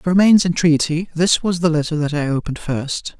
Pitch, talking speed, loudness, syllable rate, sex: 165 Hz, 205 wpm, -17 LUFS, 5.8 syllables/s, male